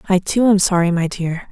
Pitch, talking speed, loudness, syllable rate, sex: 185 Hz, 240 wpm, -16 LUFS, 5.3 syllables/s, female